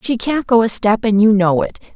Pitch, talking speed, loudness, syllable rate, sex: 220 Hz, 275 wpm, -14 LUFS, 5.4 syllables/s, female